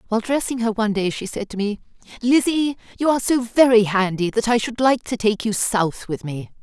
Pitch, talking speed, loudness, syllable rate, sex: 225 Hz, 225 wpm, -20 LUFS, 5.7 syllables/s, female